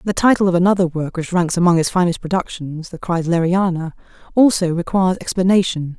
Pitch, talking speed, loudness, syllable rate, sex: 175 Hz, 160 wpm, -17 LUFS, 5.9 syllables/s, female